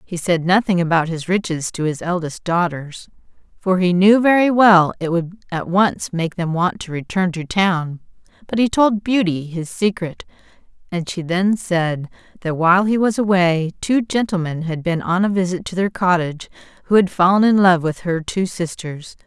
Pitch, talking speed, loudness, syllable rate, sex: 180 Hz, 185 wpm, -18 LUFS, 4.7 syllables/s, female